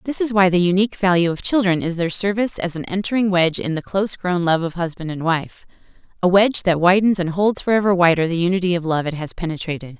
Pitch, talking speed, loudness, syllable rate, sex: 180 Hz, 235 wpm, -19 LUFS, 6.5 syllables/s, female